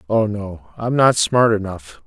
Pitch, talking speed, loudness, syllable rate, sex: 110 Hz, 205 wpm, -18 LUFS, 4.5 syllables/s, male